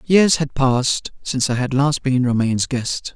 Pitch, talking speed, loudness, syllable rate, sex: 135 Hz, 190 wpm, -19 LUFS, 4.7 syllables/s, male